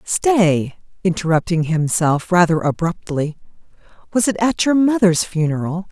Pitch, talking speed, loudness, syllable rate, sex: 180 Hz, 110 wpm, -17 LUFS, 2.7 syllables/s, female